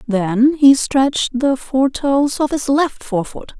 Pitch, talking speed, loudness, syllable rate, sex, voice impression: 265 Hz, 165 wpm, -16 LUFS, 3.8 syllables/s, female, feminine, adult-like, slightly relaxed, slightly powerful, bright, slightly halting, intellectual, friendly, unique, lively, sharp, light